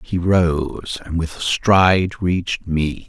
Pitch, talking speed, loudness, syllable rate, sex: 85 Hz, 155 wpm, -18 LUFS, 3.4 syllables/s, male